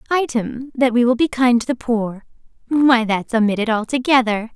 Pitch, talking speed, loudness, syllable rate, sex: 240 Hz, 170 wpm, -18 LUFS, 4.9 syllables/s, female